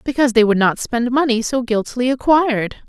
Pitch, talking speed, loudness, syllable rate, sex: 245 Hz, 190 wpm, -17 LUFS, 6.0 syllables/s, female